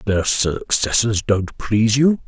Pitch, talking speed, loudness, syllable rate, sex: 110 Hz, 130 wpm, -18 LUFS, 3.9 syllables/s, male